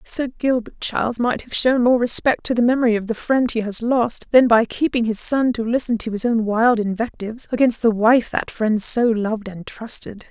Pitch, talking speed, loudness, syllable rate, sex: 230 Hz, 220 wpm, -19 LUFS, 5.0 syllables/s, female